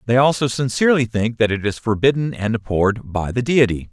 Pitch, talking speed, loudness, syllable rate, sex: 120 Hz, 200 wpm, -18 LUFS, 5.9 syllables/s, male